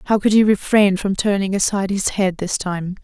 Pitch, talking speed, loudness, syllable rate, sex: 195 Hz, 215 wpm, -18 LUFS, 5.3 syllables/s, female